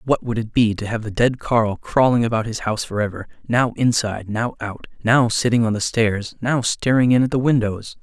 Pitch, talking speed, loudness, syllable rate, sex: 115 Hz, 225 wpm, -20 LUFS, 5.2 syllables/s, male